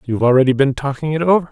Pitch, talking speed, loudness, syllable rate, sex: 140 Hz, 235 wpm, -16 LUFS, 7.9 syllables/s, male